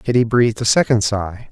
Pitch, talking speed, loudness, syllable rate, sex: 115 Hz, 200 wpm, -16 LUFS, 5.4 syllables/s, male